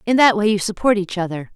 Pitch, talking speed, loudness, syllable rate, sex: 200 Hz, 270 wpm, -18 LUFS, 6.4 syllables/s, female